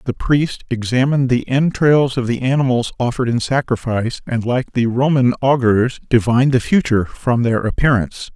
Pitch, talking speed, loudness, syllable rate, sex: 125 Hz, 160 wpm, -17 LUFS, 5.3 syllables/s, male